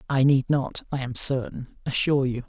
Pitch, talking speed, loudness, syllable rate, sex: 130 Hz, 195 wpm, -23 LUFS, 5.1 syllables/s, male